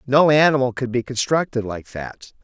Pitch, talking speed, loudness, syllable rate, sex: 125 Hz, 170 wpm, -19 LUFS, 5.0 syllables/s, male